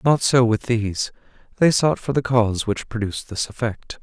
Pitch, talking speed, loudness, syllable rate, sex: 115 Hz, 195 wpm, -21 LUFS, 5.2 syllables/s, male